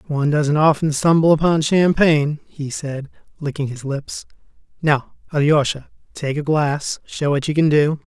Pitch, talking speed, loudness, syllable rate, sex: 150 Hz, 155 wpm, -18 LUFS, 4.6 syllables/s, male